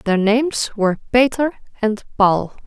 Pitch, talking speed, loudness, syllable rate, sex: 225 Hz, 135 wpm, -18 LUFS, 4.5 syllables/s, female